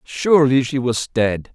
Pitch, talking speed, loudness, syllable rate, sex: 130 Hz, 155 wpm, -17 LUFS, 4.1 syllables/s, male